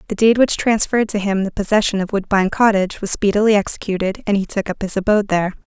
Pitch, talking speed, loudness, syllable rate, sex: 200 Hz, 220 wpm, -17 LUFS, 6.9 syllables/s, female